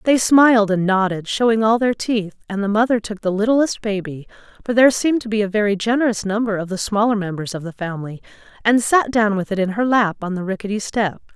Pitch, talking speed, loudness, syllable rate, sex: 210 Hz, 225 wpm, -18 LUFS, 6.0 syllables/s, female